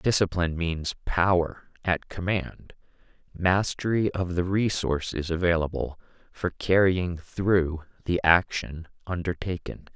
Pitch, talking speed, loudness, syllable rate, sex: 90 Hz, 95 wpm, -26 LUFS, 4.0 syllables/s, male